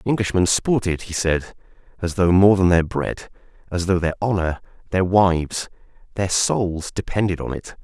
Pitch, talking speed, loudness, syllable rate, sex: 90 Hz, 155 wpm, -20 LUFS, 4.8 syllables/s, male